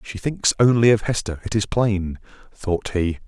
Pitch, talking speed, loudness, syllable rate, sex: 105 Hz, 185 wpm, -20 LUFS, 4.4 syllables/s, male